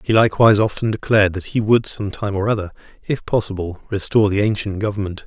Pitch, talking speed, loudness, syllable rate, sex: 105 Hz, 195 wpm, -19 LUFS, 6.5 syllables/s, male